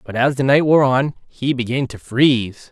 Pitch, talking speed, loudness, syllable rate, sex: 130 Hz, 220 wpm, -17 LUFS, 4.8 syllables/s, male